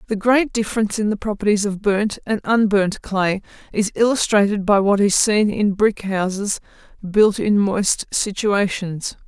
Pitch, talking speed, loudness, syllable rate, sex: 205 Hz, 155 wpm, -19 LUFS, 4.4 syllables/s, female